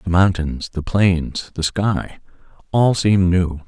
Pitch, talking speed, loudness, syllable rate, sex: 90 Hz, 145 wpm, -18 LUFS, 3.7 syllables/s, male